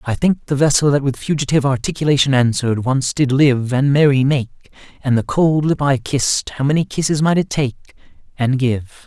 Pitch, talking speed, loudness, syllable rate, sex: 135 Hz, 185 wpm, -17 LUFS, 5.2 syllables/s, male